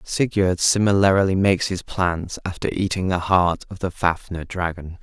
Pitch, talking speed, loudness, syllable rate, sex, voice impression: 90 Hz, 155 wpm, -21 LUFS, 4.6 syllables/s, male, very masculine, very middle-aged, very thick, tensed, powerful, dark, soft, muffled, slightly fluent, raspy, cool, intellectual, slightly refreshing, sincere, calm, very mature, friendly, reassuring, very unique, elegant, very wild, very sweet, lively, very kind, modest